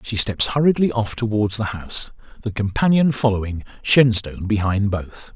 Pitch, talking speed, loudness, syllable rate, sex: 110 Hz, 145 wpm, -20 LUFS, 5.0 syllables/s, male